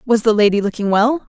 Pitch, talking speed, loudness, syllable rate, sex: 220 Hz, 220 wpm, -16 LUFS, 6.0 syllables/s, female